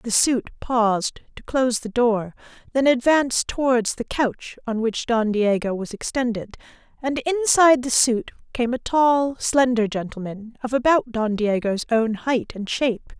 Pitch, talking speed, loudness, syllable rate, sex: 240 Hz, 160 wpm, -21 LUFS, 4.5 syllables/s, female